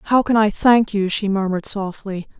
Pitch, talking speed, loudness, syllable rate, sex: 205 Hz, 200 wpm, -18 LUFS, 4.9 syllables/s, female